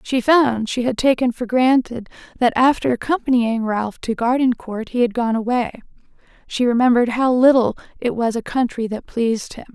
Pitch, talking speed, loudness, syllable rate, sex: 240 Hz, 170 wpm, -18 LUFS, 5.2 syllables/s, female